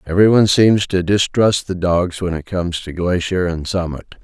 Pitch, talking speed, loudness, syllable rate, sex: 90 Hz, 185 wpm, -17 LUFS, 5.1 syllables/s, male